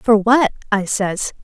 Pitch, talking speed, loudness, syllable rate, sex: 215 Hz, 170 wpm, -17 LUFS, 3.5 syllables/s, female